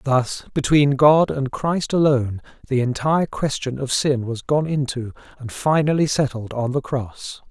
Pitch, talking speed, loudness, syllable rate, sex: 135 Hz, 160 wpm, -20 LUFS, 4.5 syllables/s, male